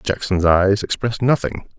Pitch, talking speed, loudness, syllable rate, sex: 105 Hz, 135 wpm, -18 LUFS, 5.0 syllables/s, male